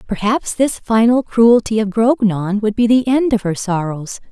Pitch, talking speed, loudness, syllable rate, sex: 220 Hz, 180 wpm, -15 LUFS, 4.4 syllables/s, female